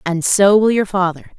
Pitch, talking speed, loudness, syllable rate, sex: 190 Hz, 215 wpm, -14 LUFS, 4.8 syllables/s, female